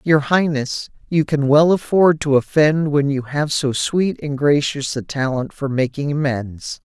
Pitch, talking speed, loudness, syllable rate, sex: 145 Hz, 175 wpm, -18 LUFS, 4.1 syllables/s, male